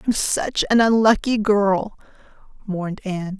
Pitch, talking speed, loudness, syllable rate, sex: 205 Hz, 125 wpm, -19 LUFS, 4.3 syllables/s, female